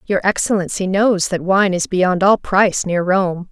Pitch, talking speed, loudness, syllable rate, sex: 190 Hz, 190 wpm, -16 LUFS, 4.4 syllables/s, female